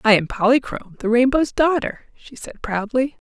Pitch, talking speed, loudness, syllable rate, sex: 240 Hz, 165 wpm, -19 LUFS, 5.2 syllables/s, female